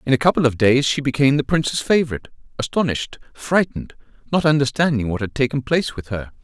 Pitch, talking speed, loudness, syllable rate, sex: 135 Hz, 185 wpm, -19 LUFS, 6.8 syllables/s, male